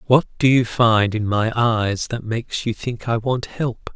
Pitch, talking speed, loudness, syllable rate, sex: 115 Hz, 210 wpm, -20 LUFS, 4.1 syllables/s, male